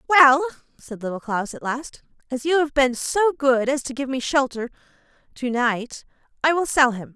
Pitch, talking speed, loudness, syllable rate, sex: 270 Hz, 195 wpm, -21 LUFS, 4.7 syllables/s, female